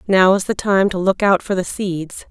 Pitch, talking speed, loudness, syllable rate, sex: 190 Hz, 260 wpm, -17 LUFS, 4.7 syllables/s, female